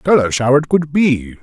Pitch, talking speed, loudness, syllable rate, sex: 140 Hz, 255 wpm, -14 LUFS, 4.6 syllables/s, male